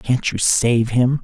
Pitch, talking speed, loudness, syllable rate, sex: 120 Hz, 195 wpm, -17 LUFS, 3.4 syllables/s, male